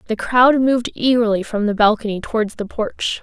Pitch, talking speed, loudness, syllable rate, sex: 225 Hz, 185 wpm, -17 LUFS, 5.4 syllables/s, female